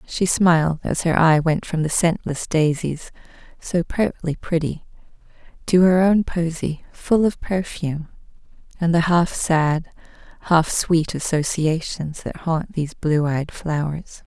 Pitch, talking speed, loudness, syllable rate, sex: 165 Hz, 140 wpm, -20 LUFS, 4.1 syllables/s, female